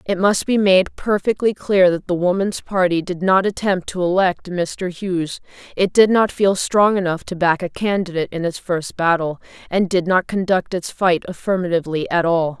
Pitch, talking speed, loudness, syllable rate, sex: 180 Hz, 190 wpm, -18 LUFS, 4.9 syllables/s, female